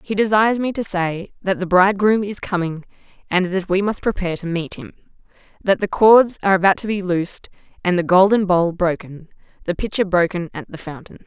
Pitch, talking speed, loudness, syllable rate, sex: 185 Hz, 195 wpm, -18 LUFS, 5.6 syllables/s, female